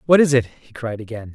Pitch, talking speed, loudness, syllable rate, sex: 125 Hz, 265 wpm, -19 LUFS, 5.9 syllables/s, male